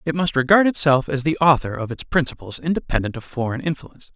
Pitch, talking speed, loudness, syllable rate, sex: 145 Hz, 200 wpm, -20 LUFS, 6.2 syllables/s, male